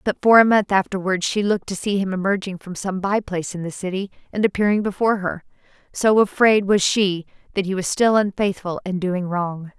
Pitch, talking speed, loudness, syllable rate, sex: 195 Hz, 210 wpm, -20 LUFS, 5.6 syllables/s, female